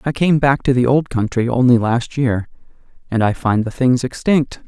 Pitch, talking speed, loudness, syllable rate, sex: 125 Hz, 205 wpm, -16 LUFS, 4.8 syllables/s, male